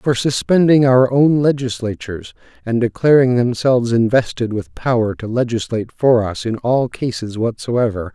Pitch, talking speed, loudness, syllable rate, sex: 120 Hz, 140 wpm, -16 LUFS, 4.9 syllables/s, male